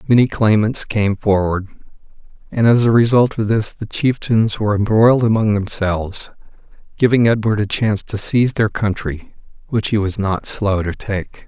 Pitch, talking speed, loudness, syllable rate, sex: 105 Hz, 160 wpm, -17 LUFS, 5.0 syllables/s, male